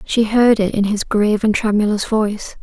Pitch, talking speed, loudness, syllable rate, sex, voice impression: 210 Hz, 205 wpm, -16 LUFS, 5.2 syllables/s, female, very feminine, slightly young, slightly adult-like, very thin, very relaxed, very weak, slightly dark, soft, slightly muffled, fluent, slightly raspy, very cute, intellectual, slightly refreshing, sincere, very calm, friendly, reassuring, unique, elegant, sweet, slightly lively, kind, slightly modest